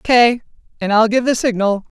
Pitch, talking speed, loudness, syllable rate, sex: 225 Hz, 180 wpm, -16 LUFS, 4.8 syllables/s, female